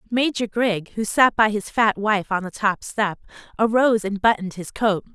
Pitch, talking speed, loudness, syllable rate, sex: 210 Hz, 200 wpm, -21 LUFS, 4.9 syllables/s, female